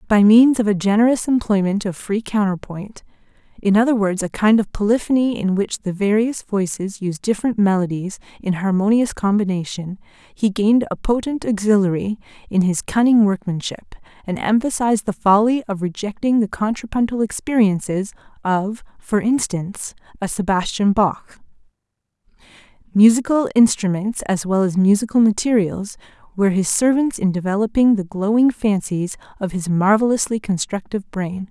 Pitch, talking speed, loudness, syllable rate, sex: 205 Hz, 135 wpm, -18 LUFS, 5.2 syllables/s, female